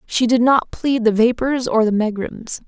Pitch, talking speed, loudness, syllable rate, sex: 235 Hz, 200 wpm, -17 LUFS, 4.4 syllables/s, female